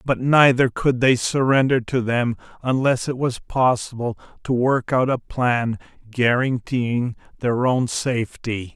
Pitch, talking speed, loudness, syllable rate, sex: 125 Hz, 135 wpm, -20 LUFS, 4.0 syllables/s, male